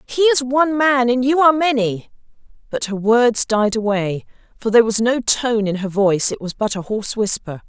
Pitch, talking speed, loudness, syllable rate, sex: 235 Hz, 210 wpm, -17 LUFS, 5.3 syllables/s, female